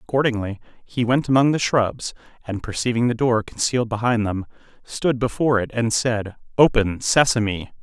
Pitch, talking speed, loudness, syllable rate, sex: 120 Hz, 155 wpm, -21 LUFS, 5.3 syllables/s, male